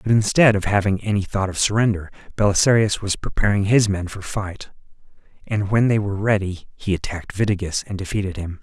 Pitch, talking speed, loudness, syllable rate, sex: 100 Hz, 180 wpm, -20 LUFS, 5.9 syllables/s, male